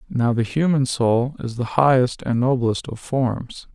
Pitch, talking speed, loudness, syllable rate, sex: 125 Hz, 175 wpm, -20 LUFS, 4.1 syllables/s, male